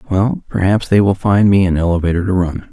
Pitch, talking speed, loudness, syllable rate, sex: 95 Hz, 220 wpm, -14 LUFS, 5.7 syllables/s, male